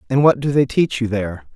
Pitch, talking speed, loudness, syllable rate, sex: 125 Hz, 270 wpm, -18 LUFS, 6.3 syllables/s, male